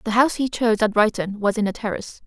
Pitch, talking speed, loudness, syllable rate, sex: 220 Hz, 265 wpm, -21 LUFS, 7.1 syllables/s, female